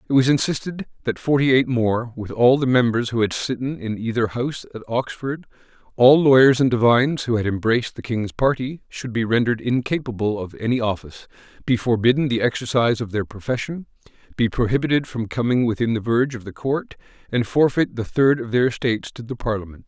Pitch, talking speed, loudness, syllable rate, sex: 120 Hz, 190 wpm, -20 LUFS, 5.9 syllables/s, male